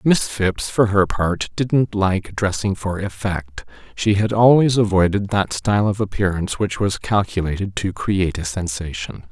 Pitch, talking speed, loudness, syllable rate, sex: 100 Hz, 155 wpm, -19 LUFS, 4.6 syllables/s, male